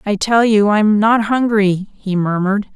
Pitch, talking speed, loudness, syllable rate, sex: 210 Hz, 175 wpm, -15 LUFS, 4.2 syllables/s, female